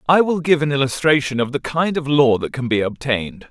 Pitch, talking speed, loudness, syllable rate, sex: 140 Hz, 240 wpm, -18 LUFS, 5.7 syllables/s, male